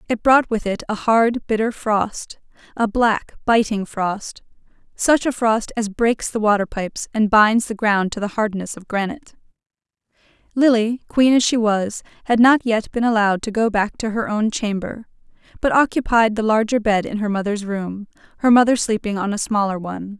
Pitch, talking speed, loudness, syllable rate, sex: 220 Hz, 180 wpm, -19 LUFS, 4.9 syllables/s, female